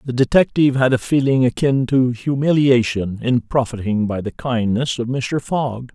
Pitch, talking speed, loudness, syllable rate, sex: 125 Hz, 160 wpm, -18 LUFS, 4.7 syllables/s, male